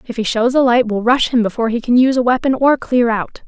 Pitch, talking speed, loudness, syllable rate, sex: 240 Hz, 295 wpm, -15 LUFS, 6.4 syllables/s, female